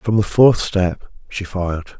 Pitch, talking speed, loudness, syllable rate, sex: 95 Hz, 180 wpm, -17 LUFS, 4.6 syllables/s, male